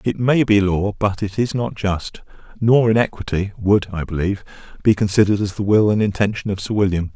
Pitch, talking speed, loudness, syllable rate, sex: 100 Hz, 210 wpm, -19 LUFS, 5.7 syllables/s, male